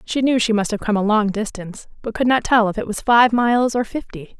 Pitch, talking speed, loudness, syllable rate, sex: 225 Hz, 275 wpm, -18 LUFS, 5.8 syllables/s, female